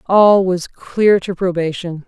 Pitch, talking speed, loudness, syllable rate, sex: 185 Hz, 145 wpm, -15 LUFS, 3.6 syllables/s, female